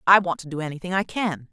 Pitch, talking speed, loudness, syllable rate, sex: 175 Hz, 275 wpm, -24 LUFS, 6.6 syllables/s, female